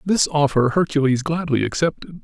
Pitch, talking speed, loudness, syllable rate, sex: 150 Hz, 135 wpm, -19 LUFS, 5.2 syllables/s, male